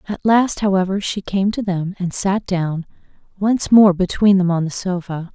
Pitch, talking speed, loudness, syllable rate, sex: 190 Hz, 190 wpm, -18 LUFS, 4.6 syllables/s, female